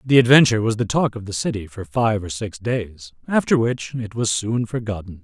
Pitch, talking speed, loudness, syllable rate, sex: 110 Hz, 220 wpm, -20 LUFS, 5.2 syllables/s, male